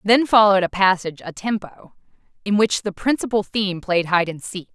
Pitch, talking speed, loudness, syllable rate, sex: 195 Hz, 190 wpm, -19 LUFS, 5.7 syllables/s, female